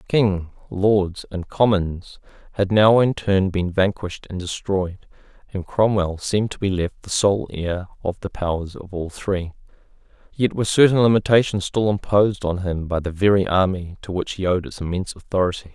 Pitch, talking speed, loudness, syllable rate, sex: 95 Hz, 175 wpm, -21 LUFS, 4.9 syllables/s, male